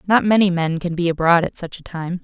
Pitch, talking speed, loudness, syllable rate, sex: 175 Hz, 270 wpm, -18 LUFS, 5.8 syllables/s, female